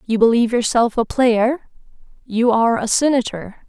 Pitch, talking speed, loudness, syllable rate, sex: 235 Hz, 145 wpm, -17 LUFS, 5.0 syllables/s, female